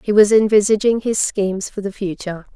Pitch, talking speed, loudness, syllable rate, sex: 205 Hz, 190 wpm, -17 LUFS, 5.9 syllables/s, female